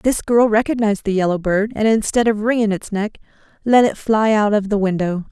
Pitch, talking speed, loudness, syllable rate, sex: 210 Hz, 215 wpm, -17 LUFS, 5.4 syllables/s, female